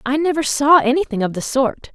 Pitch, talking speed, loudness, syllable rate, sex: 275 Hz, 215 wpm, -17 LUFS, 5.4 syllables/s, female